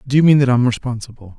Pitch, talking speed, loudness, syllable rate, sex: 125 Hz, 260 wpm, -15 LUFS, 7.2 syllables/s, male